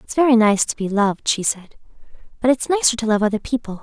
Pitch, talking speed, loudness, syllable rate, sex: 230 Hz, 235 wpm, -18 LUFS, 6.3 syllables/s, female